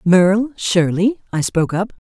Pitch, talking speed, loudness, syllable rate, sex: 195 Hz, 145 wpm, -17 LUFS, 4.6 syllables/s, female